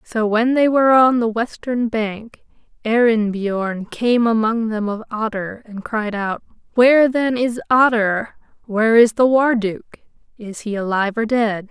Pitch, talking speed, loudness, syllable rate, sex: 225 Hz, 160 wpm, -17 LUFS, 4.2 syllables/s, female